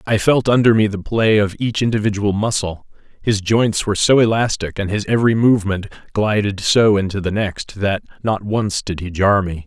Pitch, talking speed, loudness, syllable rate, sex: 105 Hz, 190 wpm, -17 LUFS, 5.1 syllables/s, male